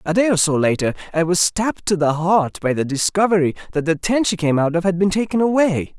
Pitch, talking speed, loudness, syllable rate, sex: 175 Hz, 250 wpm, -18 LUFS, 5.9 syllables/s, male